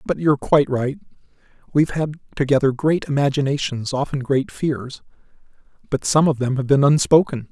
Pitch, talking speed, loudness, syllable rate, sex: 140 Hz, 150 wpm, -19 LUFS, 5.5 syllables/s, male